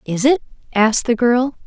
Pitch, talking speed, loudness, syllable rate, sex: 240 Hz, 180 wpm, -17 LUFS, 5.2 syllables/s, female